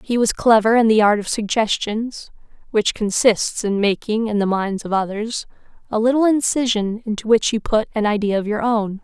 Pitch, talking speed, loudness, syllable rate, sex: 220 Hz, 195 wpm, -19 LUFS, 5.1 syllables/s, female